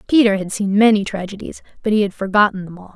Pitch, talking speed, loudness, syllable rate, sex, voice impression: 200 Hz, 225 wpm, -17 LUFS, 6.5 syllables/s, female, very feminine, slightly young, slightly adult-like, very thin, tensed, slightly powerful, bright, very hard, very clear, very fluent, slightly cute, cool, intellectual, very refreshing, very sincere, slightly calm, friendly, very reassuring, unique, elegant, slightly wild, very sweet, lively, strict, slightly intense, slightly sharp